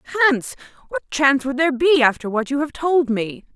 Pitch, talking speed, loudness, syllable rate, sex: 275 Hz, 205 wpm, -19 LUFS, 7.0 syllables/s, female